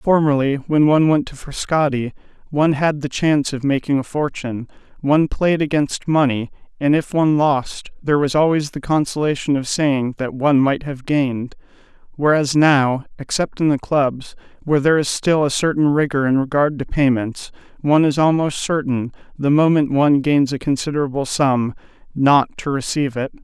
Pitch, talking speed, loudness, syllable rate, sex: 145 Hz, 170 wpm, -18 LUFS, 5.3 syllables/s, male